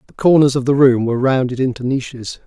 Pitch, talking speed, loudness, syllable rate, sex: 130 Hz, 220 wpm, -15 LUFS, 6.2 syllables/s, male